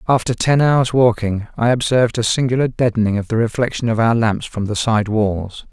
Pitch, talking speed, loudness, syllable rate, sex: 115 Hz, 200 wpm, -17 LUFS, 5.3 syllables/s, male